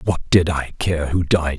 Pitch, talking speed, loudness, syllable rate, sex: 80 Hz, 225 wpm, -19 LUFS, 4.2 syllables/s, male